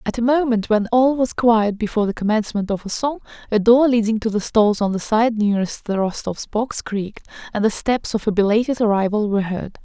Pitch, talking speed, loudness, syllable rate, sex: 220 Hz, 220 wpm, -19 LUFS, 5.8 syllables/s, female